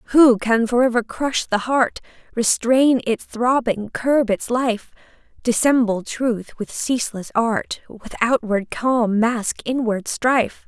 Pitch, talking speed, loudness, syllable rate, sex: 235 Hz, 135 wpm, -19 LUFS, 3.6 syllables/s, female